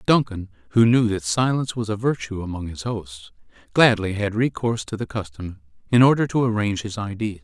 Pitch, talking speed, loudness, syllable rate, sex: 105 Hz, 185 wpm, -22 LUFS, 5.6 syllables/s, male